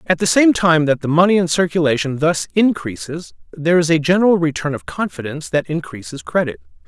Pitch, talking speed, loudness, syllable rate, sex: 160 Hz, 185 wpm, -17 LUFS, 5.9 syllables/s, male